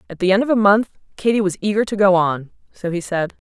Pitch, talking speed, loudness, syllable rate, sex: 195 Hz, 260 wpm, -18 LUFS, 6.3 syllables/s, female